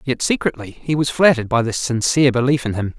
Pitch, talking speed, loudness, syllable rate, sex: 130 Hz, 220 wpm, -18 LUFS, 6.3 syllables/s, male